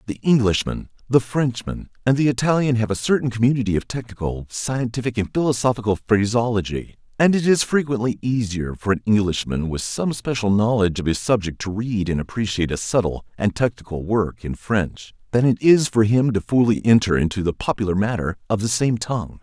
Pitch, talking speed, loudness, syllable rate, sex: 110 Hz, 180 wpm, -21 LUFS, 5.6 syllables/s, male